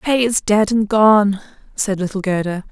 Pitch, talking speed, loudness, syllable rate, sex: 205 Hz, 175 wpm, -16 LUFS, 4.3 syllables/s, female